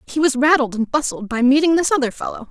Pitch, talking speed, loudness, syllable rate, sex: 275 Hz, 240 wpm, -17 LUFS, 6.4 syllables/s, female